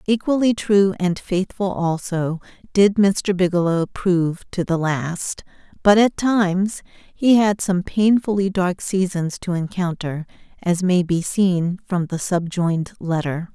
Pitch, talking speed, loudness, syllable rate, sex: 185 Hz, 135 wpm, -20 LUFS, 3.9 syllables/s, female